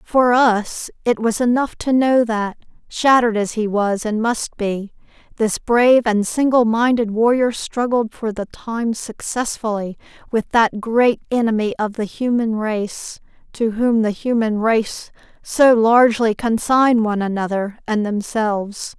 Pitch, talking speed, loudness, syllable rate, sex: 225 Hz, 145 wpm, -18 LUFS, 3.9 syllables/s, female